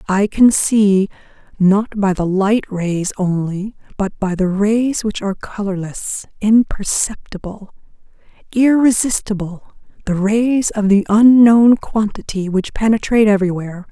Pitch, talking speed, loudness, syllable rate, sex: 205 Hz, 115 wpm, -16 LUFS, 4.2 syllables/s, female